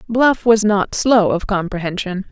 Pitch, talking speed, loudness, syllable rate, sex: 200 Hz, 155 wpm, -16 LUFS, 4.3 syllables/s, female